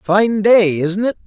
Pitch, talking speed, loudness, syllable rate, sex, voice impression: 200 Hz, 190 wpm, -14 LUFS, 3.5 syllables/s, male, masculine, old, powerful, slightly bright, muffled, raspy, mature, wild, lively, slightly strict, slightly intense